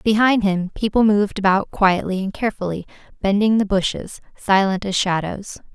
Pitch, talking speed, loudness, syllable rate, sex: 200 Hz, 145 wpm, -19 LUFS, 5.2 syllables/s, female